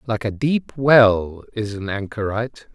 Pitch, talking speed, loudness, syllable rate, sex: 110 Hz, 155 wpm, -19 LUFS, 4.0 syllables/s, male